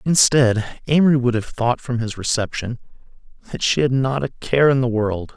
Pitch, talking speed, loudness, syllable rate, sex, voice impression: 125 Hz, 190 wpm, -19 LUFS, 4.9 syllables/s, male, very masculine, very adult-like, middle-aged, very thick, very tensed, powerful, bright, soft, very clear, fluent, slightly raspy, very cool, very intellectual, very calm, mature, friendly, reassuring, very elegant, sweet, very kind